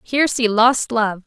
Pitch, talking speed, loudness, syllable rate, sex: 230 Hz, 190 wpm, -17 LUFS, 4.3 syllables/s, female